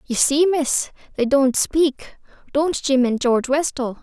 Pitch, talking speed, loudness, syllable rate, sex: 275 Hz, 165 wpm, -19 LUFS, 3.9 syllables/s, female